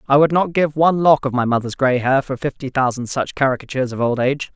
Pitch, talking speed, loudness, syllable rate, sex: 135 Hz, 250 wpm, -18 LUFS, 6.3 syllables/s, male